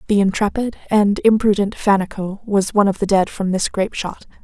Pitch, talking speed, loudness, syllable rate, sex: 200 Hz, 190 wpm, -18 LUFS, 5.6 syllables/s, female